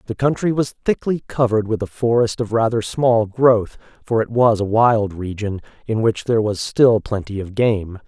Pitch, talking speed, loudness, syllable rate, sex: 110 Hz, 195 wpm, -18 LUFS, 4.8 syllables/s, male